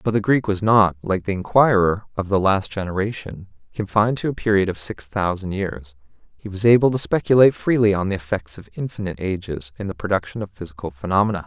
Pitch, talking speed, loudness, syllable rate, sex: 100 Hz, 200 wpm, -20 LUFS, 6.1 syllables/s, male